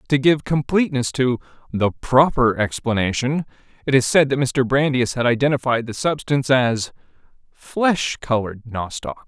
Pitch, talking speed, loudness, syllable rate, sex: 130 Hz, 135 wpm, -19 LUFS, 4.9 syllables/s, male